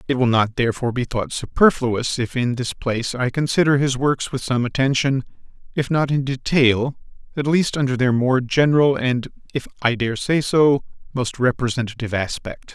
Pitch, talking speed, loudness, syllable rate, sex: 130 Hz, 175 wpm, -20 LUFS, 5.2 syllables/s, male